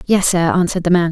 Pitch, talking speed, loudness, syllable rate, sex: 175 Hz, 270 wpm, -15 LUFS, 6.9 syllables/s, female